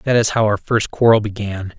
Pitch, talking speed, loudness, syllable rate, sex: 105 Hz, 235 wpm, -17 LUFS, 5.2 syllables/s, male